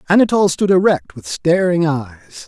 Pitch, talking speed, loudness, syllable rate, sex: 165 Hz, 145 wpm, -15 LUFS, 5.6 syllables/s, male